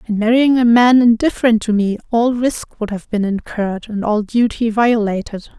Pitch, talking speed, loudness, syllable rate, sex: 225 Hz, 185 wpm, -15 LUFS, 5.1 syllables/s, female